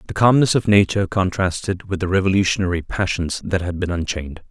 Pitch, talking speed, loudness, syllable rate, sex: 95 Hz, 175 wpm, -19 LUFS, 6.1 syllables/s, male